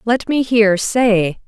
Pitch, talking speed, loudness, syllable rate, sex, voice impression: 220 Hz, 165 wpm, -15 LUFS, 3.8 syllables/s, female, feminine, slightly gender-neutral, adult-like, slightly middle-aged, tensed, slightly powerful, bright, slightly soft, clear, fluent, cool, intellectual, slightly refreshing, sincere, calm, friendly, slightly reassuring, slightly wild, lively, kind, slightly modest